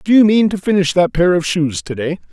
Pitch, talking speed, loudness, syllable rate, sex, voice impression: 180 Hz, 285 wpm, -15 LUFS, 5.6 syllables/s, male, very masculine, slightly old, muffled, sincere, calm, slightly mature, slightly wild